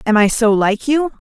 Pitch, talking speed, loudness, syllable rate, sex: 235 Hz, 235 wpm, -15 LUFS, 4.9 syllables/s, female